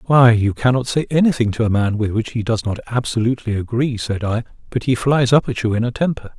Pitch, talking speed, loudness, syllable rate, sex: 120 Hz, 245 wpm, -18 LUFS, 6.1 syllables/s, male